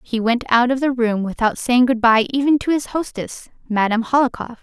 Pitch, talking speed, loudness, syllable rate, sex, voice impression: 245 Hz, 205 wpm, -18 LUFS, 5.4 syllables/s, female, feminine, adult-like, tensed, powerful, bright, clear, fluent, intellectual, slightly friendly, reassuring, elegant, lively, slightly intense